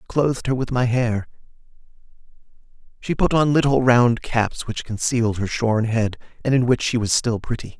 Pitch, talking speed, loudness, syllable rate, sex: 120 Hz, 190 wpm, -20 LUFS, 5.5 syllables/s, male